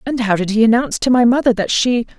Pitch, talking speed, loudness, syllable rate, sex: 235 Hz, 275 wpm, -15 LUFS, 6.6 syllables/s, female